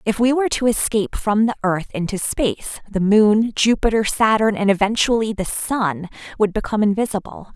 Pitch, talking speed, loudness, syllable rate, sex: 210 Hz, 165 wpm, -19 LUFS, 5.4 syllables/s, female